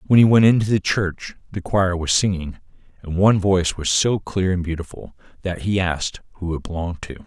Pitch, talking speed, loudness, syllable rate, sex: 90 Hz, 205 wpm, -20 LUFS, 5.6 syllables/s, male